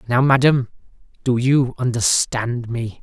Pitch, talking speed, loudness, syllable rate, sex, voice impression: 125 Hz, 120 wpm, -18 LUFS, 3.9 syllables/s, male, masculine, adult-like, refreshing, slightly sincere, slightly unique